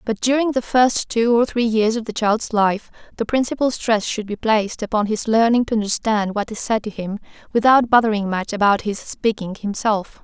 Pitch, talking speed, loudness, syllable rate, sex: 220 Hz, 205 wpm, -19 LUFS, 5.2 syllables/s, female